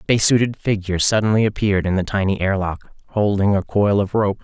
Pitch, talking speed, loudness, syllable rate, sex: 100 Hz, 190 wpm, -19 LUFS, 6.3 syllables/s, male